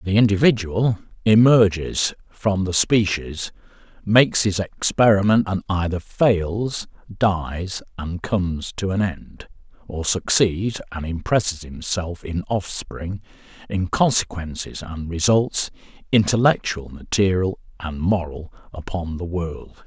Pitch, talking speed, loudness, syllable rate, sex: 95 Hz, 110 wpm, -21 LUFS, 3.8 syllables/s, male